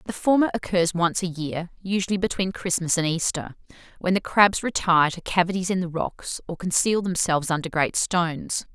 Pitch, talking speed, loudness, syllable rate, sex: 175 Hz, 180 wpm, -23 LUFS, 5.3 syllables/s, female